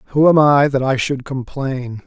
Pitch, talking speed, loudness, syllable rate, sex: 135 Hz, 205 wpm, -16 LUFS, 4.0 syllables/s, male